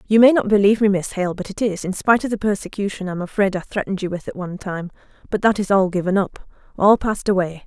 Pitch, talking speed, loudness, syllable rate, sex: 195 Hz, 245 wpm, -20 LUFS, 6.7 syllables/s, female